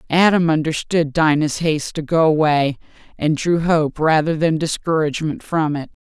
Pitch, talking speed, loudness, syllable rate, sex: 155 Hz, 150 wpm, -18 LUFS, 4.9 syllables/s, female